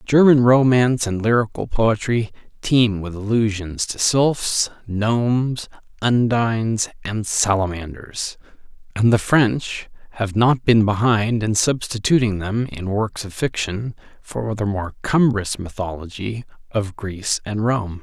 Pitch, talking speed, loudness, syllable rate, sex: 110 Hz, 125 wpm, -20 LUFS, 3.9 syllables/s, male